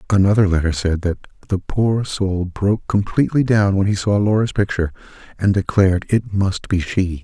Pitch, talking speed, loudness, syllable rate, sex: 95 Hz, 175 wpm, -18 LUFS, 5.2 syllables/s, male